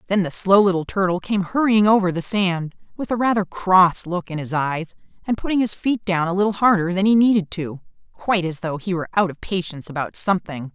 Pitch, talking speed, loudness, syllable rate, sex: 190 Hz, 220 wpm, -20 LUFS, 5.8 syllables/s, female